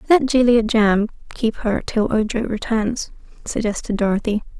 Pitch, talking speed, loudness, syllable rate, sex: 225 Hz, 130 wpm, -19 LUFS, 4.6 syllables/s, female